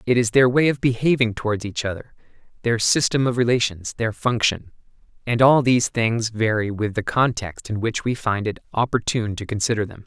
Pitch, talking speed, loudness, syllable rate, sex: 115 Hz, 190 wpm, -21 LUFS, 5.5 syllables/s, male